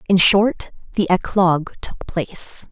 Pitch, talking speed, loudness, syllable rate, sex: 185 Hz, 135 wpm, -18 LUFS, 4.2 syllables/s, female